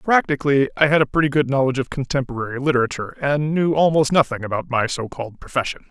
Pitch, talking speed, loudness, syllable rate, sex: 140 Hz, 185 wpm, -20 LUFS, 7.0 syllables/s, male